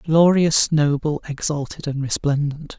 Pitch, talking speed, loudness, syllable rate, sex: 150 Hz, 110 wpm, -20 LUFS, 4.1 syllables/s, male